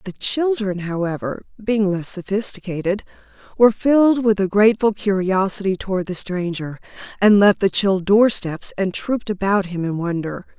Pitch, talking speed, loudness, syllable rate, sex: 195 Hz, 155 wpm, -19 LUFS, 5.0 syllables/s, female